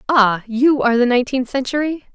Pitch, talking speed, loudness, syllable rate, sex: 255 Hz, 170 wpm, -17 LUFS, 5.9 syllables/s, female